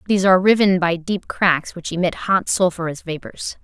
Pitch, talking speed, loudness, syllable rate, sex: 180 Hz, 180 wpm, -19 LUFS, 5.3 syllables/s, female